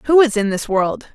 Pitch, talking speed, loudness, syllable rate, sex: 230 Hz, 260 wpm, -17 LUFS, 4.7 syllables/s, female